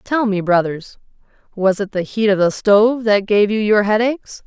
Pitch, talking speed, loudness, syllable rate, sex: 210 Hz, 200 wpm, -16 LUFS, 4.9 syllables/s, female